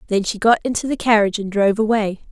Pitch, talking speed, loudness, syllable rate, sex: 215 Hz, 235 wpm, -18 LUFS, 7.0 syllables/s, female